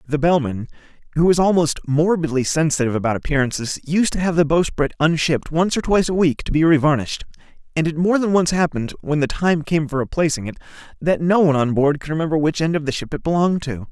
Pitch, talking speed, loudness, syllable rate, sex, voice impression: 155 Hz, 220 wpm, -19 LUFS, 6.5 syllables/s, male, masculine, middle-aged, powerful, slightly hard, slightly halting, raspy, cool, intellectual, wild, lively, intense